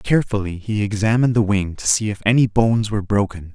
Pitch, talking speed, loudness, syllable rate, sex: 105 Hz, 205 wpm, -19 LUFS, 6.3 syllables/s, male